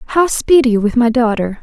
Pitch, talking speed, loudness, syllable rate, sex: 245 Hz, 220 wpm, -13 LUFS, 4.4 syllables/s, female